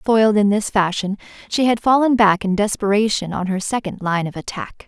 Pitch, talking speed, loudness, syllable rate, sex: 205 Hz, 195 wpm, -18 LUFS, 5.4 syllables/s, female